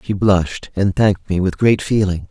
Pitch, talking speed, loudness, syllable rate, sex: 95 Hz, 210 wpm, -17 LUFS, 5.1 syllables/s, male